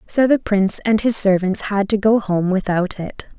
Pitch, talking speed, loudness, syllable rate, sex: 205 Hz, 215 wpm, -17 LUFS, 4.7 syllables/s, female